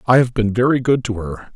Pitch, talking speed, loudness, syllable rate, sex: 115 Hz, 270 wpm, -17 LUFS, 6.2 syllables/s, male